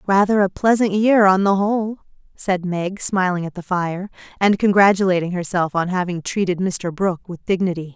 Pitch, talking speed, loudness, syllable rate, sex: 190 Hz, 175 wpm, -19 LUFS, 5.1 syllables/s, female